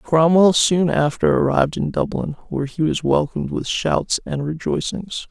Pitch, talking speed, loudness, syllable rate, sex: 160 Hz, 160 wpm, -19 LUFS, 4.7 syllables/s, male